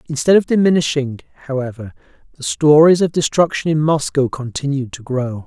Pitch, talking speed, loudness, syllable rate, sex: 145 Hz, 145 wpm, -16 LUFS, 5.5 syllables/s, male